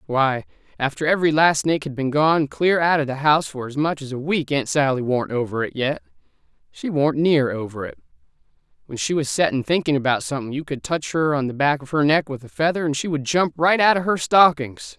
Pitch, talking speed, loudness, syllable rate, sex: 150 Hz, 235 wpm, -20 LUFS, 5.8 syllables/s, male